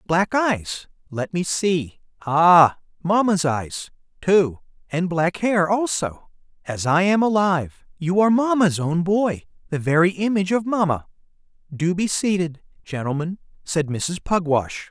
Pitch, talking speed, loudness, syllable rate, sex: 175 Hz, 130 wpm, -21 LUFS, 4.2 syllables/s, male